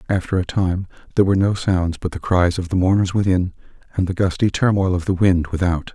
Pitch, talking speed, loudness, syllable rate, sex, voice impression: 90 Hz, 220 wpm, -19 LUFS, 5.9 syllables/s, male, very masculine, very adult-like, very old, very thick, relaxed, very powerful, weak, dark, soft, very muffled, fluent, very raspy, very cool, intellectual, sincere, very calm, very mature, very friendly, very reassuring, very unique, elegant, very wild, very sweet, very kind, modest